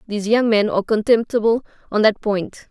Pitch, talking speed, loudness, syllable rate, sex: 215 Hz, 180 wpm, -18 LUFS, 6.0 syllables/s, female